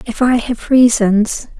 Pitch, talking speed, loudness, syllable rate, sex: 235 Hz, 150 wpm, -13 LUFS, 3.6 syllables/s, female